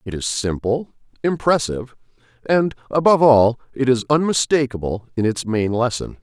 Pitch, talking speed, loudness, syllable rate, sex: 125 Hz, 135 wpm, -19 LUFS, 5.2 syllables/s, male